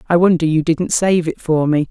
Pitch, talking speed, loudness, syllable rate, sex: 165 Hz, 250 wpm, -16 LUFS, 5.2 syllables/s, female